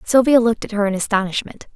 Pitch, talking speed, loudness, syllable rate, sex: 220 Hz, 205 wpm, -18 LUFS, 6.8 syllables/s, female